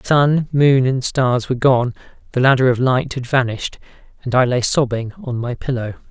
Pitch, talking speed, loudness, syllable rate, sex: 125 Hz, 185 wpm, -17 LUFS, 5.1 syllables/s, male